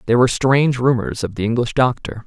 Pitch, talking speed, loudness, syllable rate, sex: 120 Hz, 210 wpm, -17 LUFS, 6.6 syllables/s, male